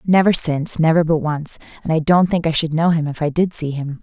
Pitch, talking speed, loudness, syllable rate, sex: 160 Hz, 270 wpm, -17 LUFS, 5.7 syllables/s, female